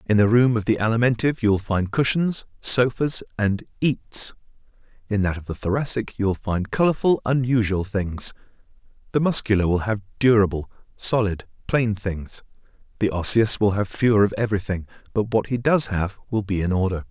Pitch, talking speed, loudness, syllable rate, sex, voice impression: 110 Hz, 170 wpm, -22 LUFS, 5.3 syllables/s, male, masculine, very adult-like, slightly muffled, fluent, sincere, calm, elegant, slightly sweet